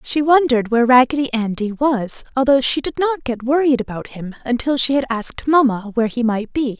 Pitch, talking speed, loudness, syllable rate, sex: 250 Hz, 205 wpm, -17 LUFS, 5.6 syllables/s, female